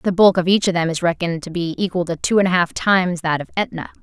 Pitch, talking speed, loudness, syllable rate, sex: 180 Hz, 300 wpm, -18 LUFS, 6.5 syllables/s, female